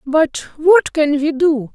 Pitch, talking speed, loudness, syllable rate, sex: 305 Hz, 170 wpm, -15 LUFS, 3.3 syllables/s, female